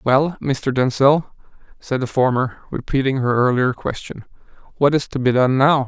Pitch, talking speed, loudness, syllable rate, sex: 135 Hz, 165 wpm, -18 LUFS, 4.7 syllables/s, male